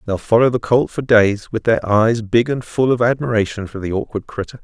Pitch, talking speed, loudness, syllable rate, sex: 115 Hz, 235 wpm, -17 LUFS, 5.4 syllables/s, male